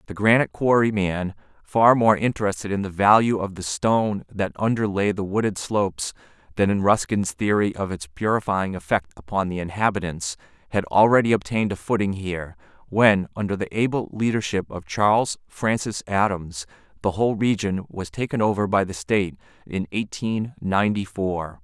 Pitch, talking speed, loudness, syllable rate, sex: 100 Hz, 155 wpm, -22 LUFS, 5.3 syllables/s, male